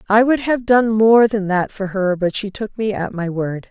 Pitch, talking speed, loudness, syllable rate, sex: 205 Hz, 260 wpm, -17 LUFS, 4.5 syllables/s, female